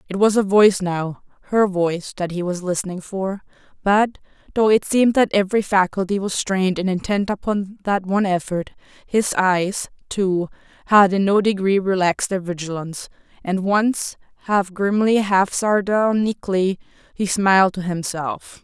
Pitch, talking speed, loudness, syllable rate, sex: 195 Hz, 150 wpm, -20 LUFS, 4.8 syllables/s, female